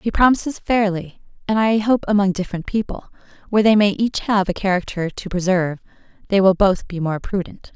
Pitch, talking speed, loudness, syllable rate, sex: 200 Hz, 185 wpm, -19 LUFS, 5.7 syllables/s, female